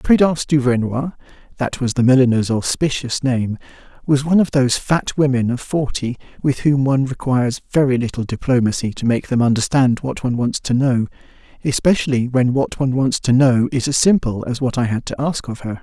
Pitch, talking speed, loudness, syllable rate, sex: 130 Hz, 190 wpm, -18 LUFS, 5.1 syllables/s, male